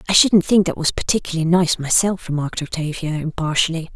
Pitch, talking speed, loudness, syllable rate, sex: 170 Hz, 165 wpm, -18 LUFS, 6.2 syllables/s, female